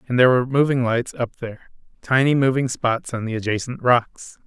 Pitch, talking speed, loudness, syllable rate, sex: 125 Hz, 190 wpm, -20 LUFS, 5.5 syllables/s, male